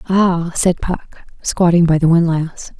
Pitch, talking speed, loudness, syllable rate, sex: 170 Hz, 150 wpm, -16 LUFS, 4.0 syllables/s, female